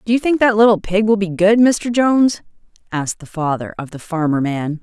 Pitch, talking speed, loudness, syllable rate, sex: 195 Hz, 225 wpm, -16 LUFS, 5.5 syllables/s, female